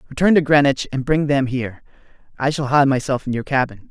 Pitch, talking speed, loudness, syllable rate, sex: 135 Hz, 215 wpm, -18 LUFS, 6.1 syllables/s, male